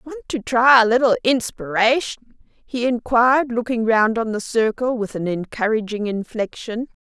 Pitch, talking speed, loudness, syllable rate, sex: 235 Hz, 145 wpm, -19 LUFS, 4.6 syllables/s, female